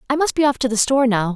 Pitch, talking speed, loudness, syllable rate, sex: 250 Hz, 355 wpm, -18 LUFS, 7.7 syllables/s, female